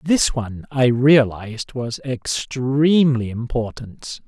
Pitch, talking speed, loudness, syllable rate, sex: 125 Hz, 100 wpm, -19 LUFS, 3.7 syllables/s, male